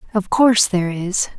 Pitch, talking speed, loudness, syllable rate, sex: 200 Hz, 175 wpm, -17 LUFS, 5.8 syllables/s, female